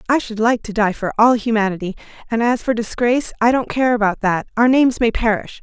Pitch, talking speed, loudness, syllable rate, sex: 230 Hz, 215 wpm, -17 LUFS, 6.0 syllables/s, female